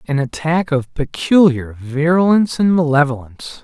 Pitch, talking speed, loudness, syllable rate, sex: 150 Hz, 115 wpm, -16 LUFS, 4.9 syllables/s, male